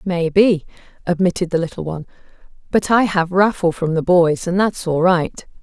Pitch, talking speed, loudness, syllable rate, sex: 175 Hz, 170 wpm, -17 LUFS, 5.1 syllables/s, female